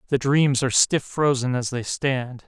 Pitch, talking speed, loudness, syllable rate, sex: 130 Hz, 195 wpm, -22 LUFS, 4.4 syllables/s, male